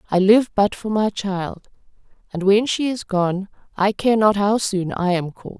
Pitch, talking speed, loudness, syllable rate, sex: 200 Hz, 205 wpm, -19 LUFS, 4.5 syllables/s, female